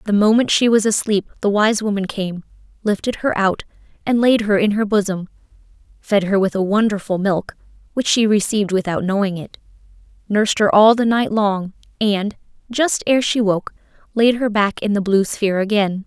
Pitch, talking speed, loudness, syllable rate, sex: 205 Hz, 185 wpm, -18 LUFS, 5.2 syllables/s, female